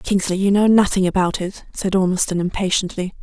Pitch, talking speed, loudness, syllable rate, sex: 190 Hz, 165 wpm, -18 LUFS, 5.7 syllables/s, female